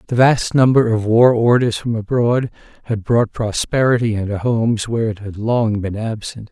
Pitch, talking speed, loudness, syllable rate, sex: 115 Hz, 175 wpm, -17 LUFS, 4.9 syllables/s, male